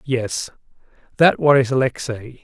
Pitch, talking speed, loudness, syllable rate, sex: 130 Hz, 100 wpm, -18 LUFS, 4.3 syllables/s, male